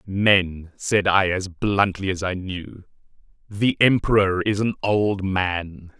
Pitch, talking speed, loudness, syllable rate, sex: 95 Hz, 140 wpm, -21 LUFS, 3.3 syllables/s, male